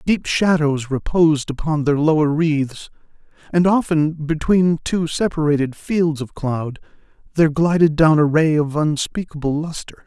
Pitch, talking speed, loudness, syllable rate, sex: 155 Hz, 135 wpm, -18 LUFS, 4.5 syllables/s, male